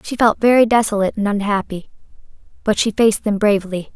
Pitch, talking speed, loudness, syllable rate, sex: 210 Hz, 165 wpm, -17 LUFS, 6.5 syllables/s, female